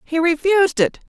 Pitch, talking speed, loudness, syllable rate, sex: 335 Hz, 155 wpm, -17 LUFS, 5.1 syllables/s, female